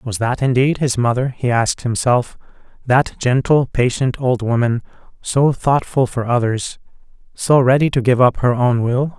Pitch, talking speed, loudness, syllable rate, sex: 125 Hz, 165 wpm, -17 LUFS, 4.5 syllables/s, male